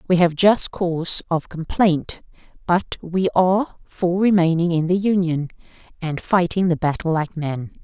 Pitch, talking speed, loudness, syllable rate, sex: 175 Hz, 155 wpm, -20 LUFS, 4.3 syllables/s, female